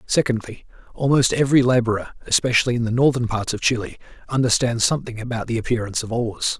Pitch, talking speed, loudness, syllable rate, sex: 120 Hz, 165 wpm, -20 LUFS, 6.6 syllables/s, male